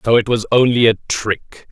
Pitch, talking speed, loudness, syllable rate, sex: 115 Hz, 210 wpm, -16 LUFS, 4.5 syllables/s, male